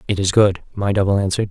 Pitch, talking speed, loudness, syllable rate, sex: 100 Hz, 240 wpm, -18 LUFS, 7.3 syllables/s, male